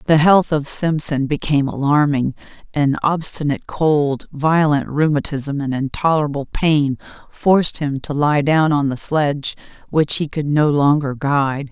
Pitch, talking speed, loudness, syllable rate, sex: 145 Hz, 145 wpm, -18 LUFS, 4.5 syllables/s, female